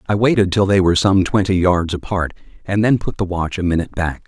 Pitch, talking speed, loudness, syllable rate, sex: 95 Hz, 240 wpm, -17 LUFS, 6.2 syllables/s, male